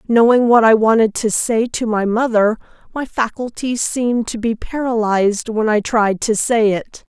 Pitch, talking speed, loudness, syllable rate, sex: 225 Hz, 175 wpm, -16 LUFS, 4.6 syllables/s, female